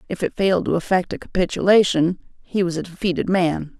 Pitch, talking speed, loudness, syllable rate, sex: 180 Hz, 190 wpm, -20 LUFS, 5.9 syllables/s, female